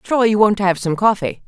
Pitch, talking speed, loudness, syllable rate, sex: 200 Hz, 245 wpm, -16 LUFS, 5.4 syllables/s, female